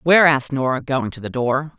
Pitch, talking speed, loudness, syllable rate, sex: 140 Hz, 235 wpm, -19 LUFS, 5.9 syllables/s, female